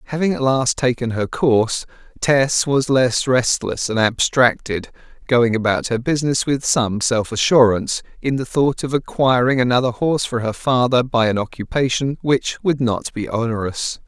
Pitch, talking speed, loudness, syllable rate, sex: 125 Hz, 160 wpm, -18 LUFS, 4.8 syllables/s, male